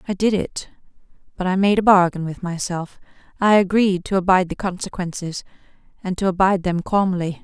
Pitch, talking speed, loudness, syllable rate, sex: 185 Hz, 160 wpm, -20 LUFS, 5.7 syllables/s, female